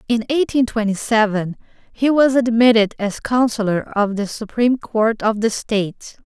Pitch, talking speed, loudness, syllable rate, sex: 225 Hz, 155 wpm, -18 LUFS, 4.7 syllables/s, female